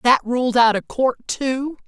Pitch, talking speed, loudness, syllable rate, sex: 250 Hz, 190 wpm, -19 LUFS, 3.7 syllables/s, female